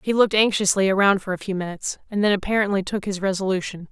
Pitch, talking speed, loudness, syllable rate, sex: 195 Hz, 215 wpm, -21 LUFS, 7.0 syllables/s, female